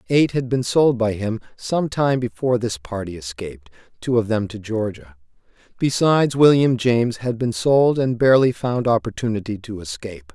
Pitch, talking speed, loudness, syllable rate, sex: 115 Hz, 170 wpm, -20 LUFS, 4.9 syllables/s, male